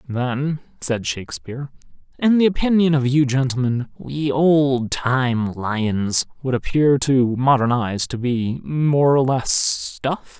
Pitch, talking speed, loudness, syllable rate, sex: 135 Hz, 140 wpm, -19 LUFS, 3.6 syllables/s, male